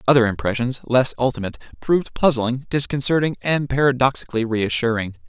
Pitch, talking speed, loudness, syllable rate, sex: 125 Hz, 115 wpm, -20 LUFS, 6.1 syllables/s, male